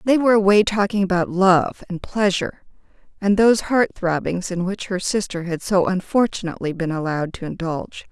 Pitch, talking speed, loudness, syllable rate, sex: 190 Hz, 170 wpm, -20 LUFS, 5.6 syllables/s, female